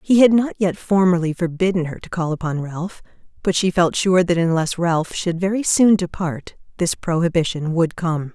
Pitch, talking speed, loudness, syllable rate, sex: 175 Hz, 185 wpm, -19 LUFS, 4.9 syllables/s, female